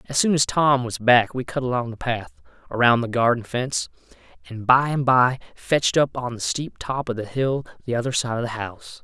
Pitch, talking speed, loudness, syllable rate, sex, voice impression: 125 Hz, 225 wpm, -22 LUFS, 5.3 syllables/s, male, masculine, slightly young, slightly adult-like, slightly thick, slightly tensed, slightly powerful, bright, slightly soft, clear, fluent, slightly raspy, cool, slightly intellectual, very refreshing, very sincere, slightly calm, very friendly, slightly reassuring, slightly unique, wild, slightly sweet, very lively, kind, slightly intense, light